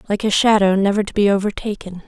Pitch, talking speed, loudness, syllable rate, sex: 200 Hz, 205 wpm, -17 LUFS, 6.4 syllables/s, female